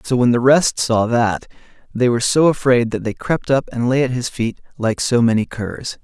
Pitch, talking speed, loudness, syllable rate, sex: 120 Hz, 230 wpm, -17 LUFS, 4.9 syllables/s, male